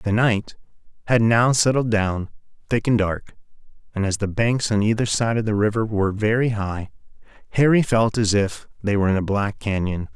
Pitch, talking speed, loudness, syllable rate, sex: 105 Hz, 190 wpm, -21 LUFS, 5.1 syllables/s, male